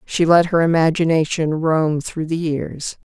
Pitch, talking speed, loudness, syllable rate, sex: 160 Hz, 155 wpm, -18 LUFS, 4.1 syllables/s, female